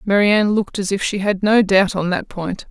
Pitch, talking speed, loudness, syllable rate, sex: 200 Hz, 245 wpm, -17 LUFS, 5.4 syllables/s, female